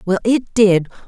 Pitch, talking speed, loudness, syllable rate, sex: 205 Hz, 165 wpm, -15 LUFS, 4.1 syllables/s, female